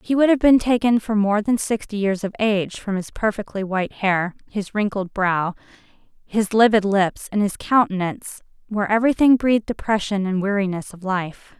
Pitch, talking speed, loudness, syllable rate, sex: 205 Hz, 175 wpm, -20 LUFS, 5.3 syllables/s, female